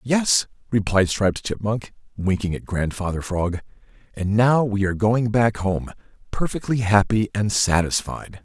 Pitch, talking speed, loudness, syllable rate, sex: 105 Hz, 135 wpm, -21 LUFS, 4.5 syllables/s, male